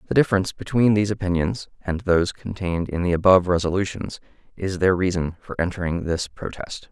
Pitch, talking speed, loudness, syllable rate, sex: 90 Hz, 165 wpm, -22 LUFS, 6.1 syllables/s, male